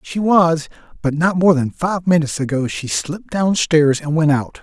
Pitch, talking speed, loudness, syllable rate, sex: 155 Hz, 210 wpm, -17 LUFS, 4.8 syllables/s, male